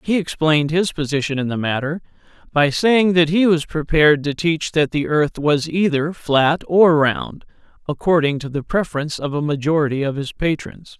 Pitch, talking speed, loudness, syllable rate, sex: 155 Hz, 180 wpm, -18 LUFS, 5.0 syllables/s, male